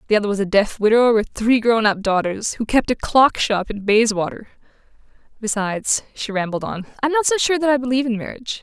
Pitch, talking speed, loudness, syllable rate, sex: 225 Hz, 210 wpm, -19 LUFS, 6.1 syllables/s, female